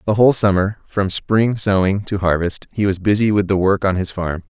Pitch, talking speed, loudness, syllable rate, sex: 100 Hz, 225 wpm, -17 LUFS, 5.2 syllables/s, male